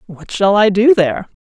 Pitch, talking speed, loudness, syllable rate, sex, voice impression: 205 Hz, 210 wpm, -13 LUFS, 5.2 syllables/s, female, very feminine, adult-like, middle-aged, slightly thin, tensed, very powerful, slightly bright, hard, very clear, fluent, cool, very intellectual, refreshing, very sincere, slightly calm, slightly friendly, reassuring, unique, elegant, slightly wild, slightly sweet, lively, slightly strict, slightly intense